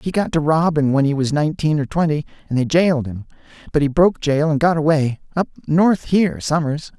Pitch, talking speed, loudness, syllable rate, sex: 150 Hz, 205 wpm, -18 LUFS, 5.8 syllables/s, male